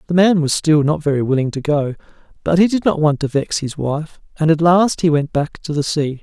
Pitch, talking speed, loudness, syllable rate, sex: 155 Hz, 260 wpm, -17 LUFS, 5.4 syllables/s, male